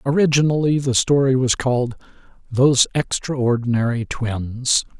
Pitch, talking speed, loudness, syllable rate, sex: 130 Hz, 95 wpm, -19 LUFS, 4.6 syllables/s, male